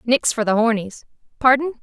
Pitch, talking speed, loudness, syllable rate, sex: 240 Hz, 165 wpm, -18 LUFS, 5.5 syllables/s, female